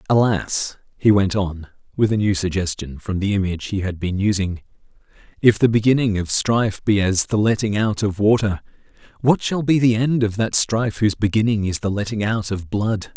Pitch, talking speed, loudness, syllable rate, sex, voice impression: 105 Hz, 195 wpm, -20 LUFS, 5.3 syllables/s, male, masculine, adult-like, tensed, powerful, slightly hard, clear, raspy, cool, intellectual, calm, friendly, reassuring, wild, lively, slightly kind